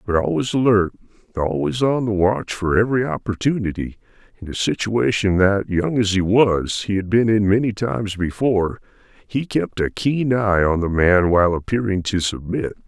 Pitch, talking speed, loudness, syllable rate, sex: 105 Hz, 170 wpm, -19 LUFS, 5.0 syllables/s, male